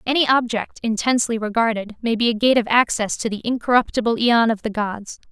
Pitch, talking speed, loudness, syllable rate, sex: 225 Hz, 190 wpm, -19 LUFS, 5.8 syllables/s, female